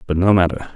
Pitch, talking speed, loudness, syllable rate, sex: 90 Hz, 240 wpm, -16 LUFS, 6.7 syllables/s, male